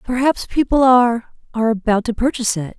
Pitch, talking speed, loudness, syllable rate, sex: 235 Hz, 150 wpm, -17 LUFS, 6.3 syllables/s, female